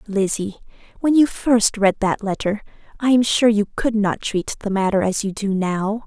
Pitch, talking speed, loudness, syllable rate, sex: 210 Hz, 200 wpm, -19 LUFS, 4.6 syllables/s, female